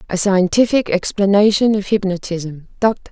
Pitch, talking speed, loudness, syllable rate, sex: 200 Hz, 95 wpm, -16 LUFS, 4.8 syllables/s, female